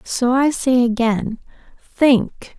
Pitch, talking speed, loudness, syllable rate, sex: 245 Hz, 115 wpm, -17 LUFS, 2.9 syllables/s, female